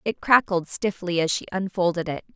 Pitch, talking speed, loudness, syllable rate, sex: 185 Hz, 180 wpm, -23 LUFS, 5.2 syllables/s, female